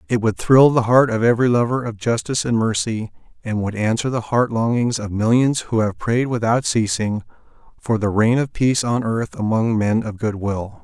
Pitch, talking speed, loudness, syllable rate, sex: 115 Hz, 205 wpm, -19 LUFS, 5.1 syllables/s, male